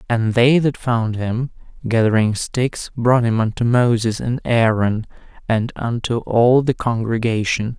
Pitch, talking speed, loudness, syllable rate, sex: 115 Hz, 140 wpm, -18 LUFS, 4.0 syllables/s, male